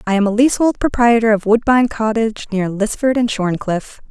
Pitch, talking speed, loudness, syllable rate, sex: 220 Hz, 160 wpm, -16 LUFS, 5.7 syllables/s, female